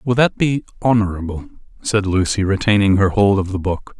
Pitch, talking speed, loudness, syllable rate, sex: 100 Hz, 180 wpm, -17 LUFS, 5.3 syllables/s, male